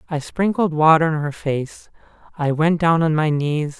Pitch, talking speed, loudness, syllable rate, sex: 155 Hz, 190 wpm, -19 LUFS, 4.5 syllables/s, male